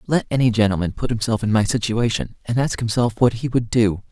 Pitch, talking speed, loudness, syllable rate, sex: 110 Hz, 220 wpm, -20 LUFS, 5.9 syllables/s, male